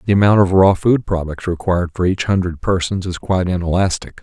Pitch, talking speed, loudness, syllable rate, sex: 90 Hz, 200 wpm, -17 LUFS, 5.9 syllables/s, male